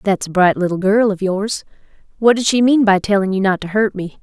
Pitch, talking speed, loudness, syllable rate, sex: 200 Hz, 240 wpm, -16 LUFS, 5.6 syllables/s, female